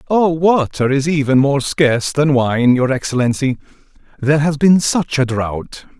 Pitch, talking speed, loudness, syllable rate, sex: 140 Hz, 150 wpm, -15 LUFS, 4.5 syllables/s, male